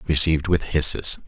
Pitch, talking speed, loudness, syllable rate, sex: 75 Hz, 140 wpm, -18 LUFS, 5.6 syllables/s, male